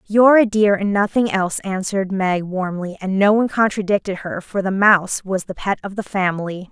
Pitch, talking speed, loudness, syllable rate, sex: 195 Hz, 205 wpm, -18 LUFS, 5.5 syllables/s, female